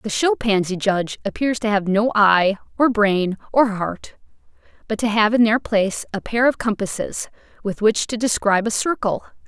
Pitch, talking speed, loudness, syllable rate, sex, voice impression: 215 Hz, 185 wpm, -19 LUFS, 4.9 syllables/s, female, feminine, adult-like, tensed, powerful, clear, fluent, intellectual, calm, lively, slightly intense, slightly sharp, light